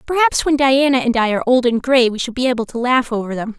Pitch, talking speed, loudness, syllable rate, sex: 250 Hz, 285 wpm, -16 LUFS, 6.4 syllables/s, female